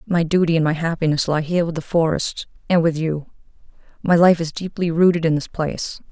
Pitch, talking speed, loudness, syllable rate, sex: 165 Hz, 205 wpm, -19 LUFS, 5.8 syllables/s, female